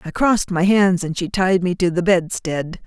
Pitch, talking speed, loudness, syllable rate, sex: 180 Hz, 230 wpm, -18 LUFS, 4.7 syllables/s, female